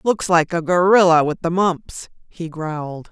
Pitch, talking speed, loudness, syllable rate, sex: 170 Hz, 175 wpm, -17 LUFS, 4.3 syllables/s, female